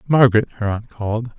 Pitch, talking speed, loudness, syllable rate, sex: 115 Hz, 175 wpm, -19 LUFS, 6.4 syllables/s, male